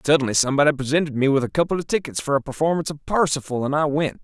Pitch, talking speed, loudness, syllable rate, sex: 145 Hz, 240 wpm, -21 LUFS, 7.7 syllables/s, male